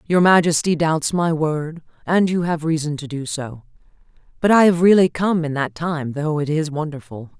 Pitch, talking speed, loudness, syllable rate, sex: 160 Hz, 195 wpm, -19 LUFS, 4.8 syllables/s, female